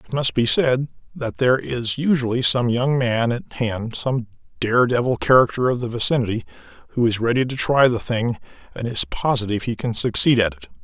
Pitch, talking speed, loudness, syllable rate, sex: 115 Hz, 195 wpm, -20 LUFS, 5.3 syllables/s, male